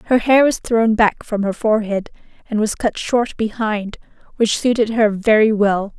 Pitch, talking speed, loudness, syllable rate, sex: 220 Hz, 180 wpm, -17 LUFS, 4.5 syllables/s, female